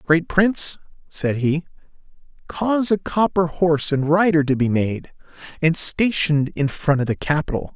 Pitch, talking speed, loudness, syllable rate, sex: 160 Hz, 155 wpm, -19 LUFS, 4.8 syllables/s, male